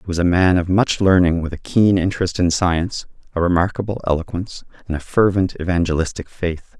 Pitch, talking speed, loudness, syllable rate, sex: 90 Hz, 185 wpm, -18 LUFS, 6.2 syllables/s, male